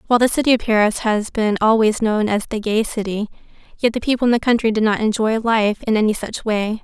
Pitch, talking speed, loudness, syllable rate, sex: 220 Hz, 235 wpm, -18 LUFS, 5.9 syllables/s, female